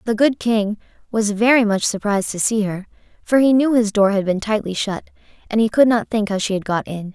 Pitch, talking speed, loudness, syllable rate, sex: 215 Hz, 245 wpm, -18 LUFS, 5.6 syllables/s, female